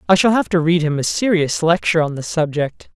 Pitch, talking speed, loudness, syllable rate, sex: 165 Hz, 240 wpm, -17 LUFS, 5.8 syllables/s, female